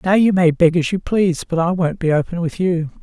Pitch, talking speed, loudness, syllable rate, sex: 175 Hz, 280 wpm, -17 LUFS, 5.6 syllables/s, female